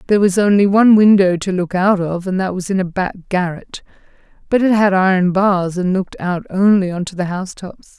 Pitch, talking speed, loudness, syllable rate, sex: 190 Hz, 220 wpm, -15 LUFS, 5.6 syllables/s, female